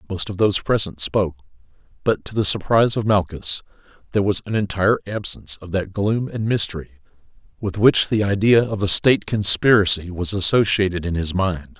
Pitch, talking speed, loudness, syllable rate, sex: 100 Hz, 175 wpm, -19 LUFS, 5.7 syllables/s, male